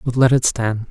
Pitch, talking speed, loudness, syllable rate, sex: 120 Hz, 265 wpm, -17 LUFS, 5.0 syllables/s, male